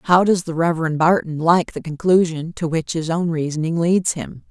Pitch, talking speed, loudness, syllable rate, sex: 165 Hz, 200 wpm, -19 LUFS, 5.0 syllables/s, female